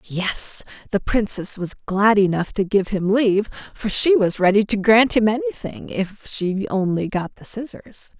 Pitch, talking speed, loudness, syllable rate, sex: 210 Hz, 175 wpm, -20 LUFS, 4.3 syllables/s, female